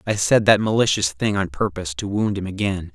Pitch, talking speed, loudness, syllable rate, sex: 100 Hz, 225 wpm, -20 LUFS, 5.7 syllables/s, male